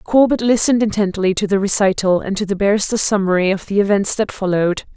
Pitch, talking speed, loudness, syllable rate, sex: 200 Hz, 195 wpm, -16 LUFS, 6.3 syllables/s, female